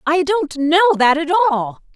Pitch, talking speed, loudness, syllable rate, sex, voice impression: 320 Hz, 185 wpm, -15 LUFS, 4.4 syllables/s, female, feminine, adult-like, slightly bright, clear, slightly refreshing, friendly, slightly reassuring